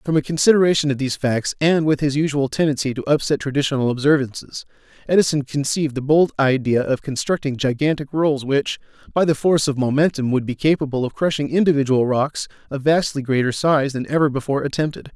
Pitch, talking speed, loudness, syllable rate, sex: 140 Hz, 180 wpm, -19 LUFS, 6.2 syllables/s, male